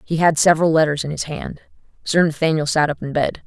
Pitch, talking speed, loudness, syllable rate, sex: 155 Hz, 225 wpm, -18 LUFS, 6.3 syllables/s, female